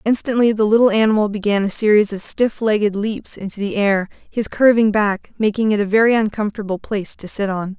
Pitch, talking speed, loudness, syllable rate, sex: 210 Hz, 200 wpm, -17 LUFS, 5.7 syllables/s, female